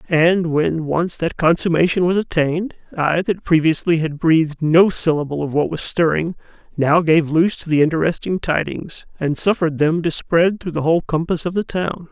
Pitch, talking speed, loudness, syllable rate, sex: 165 Hz, 185 wpm, -18 LUFS, 5.1 syllables/s, male